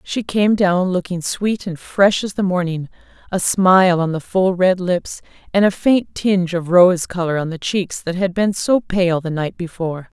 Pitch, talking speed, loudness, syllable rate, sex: 180 Hz, 205 wpm, -17 LUFS, 4.5 syllables/s, female